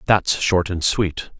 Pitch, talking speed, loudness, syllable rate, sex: 90 Hz, 170 wpm, -19 LUFS, 3.4 syllables/s, male